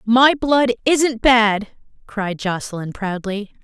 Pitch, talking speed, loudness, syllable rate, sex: 225 Hz, 115 wpm, -18 LUFS, 3.4 syllables/s, female